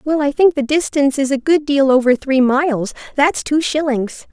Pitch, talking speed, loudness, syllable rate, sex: 280 Hz, 195 wpm, -16 LUFS, 5.0 syllables/s, female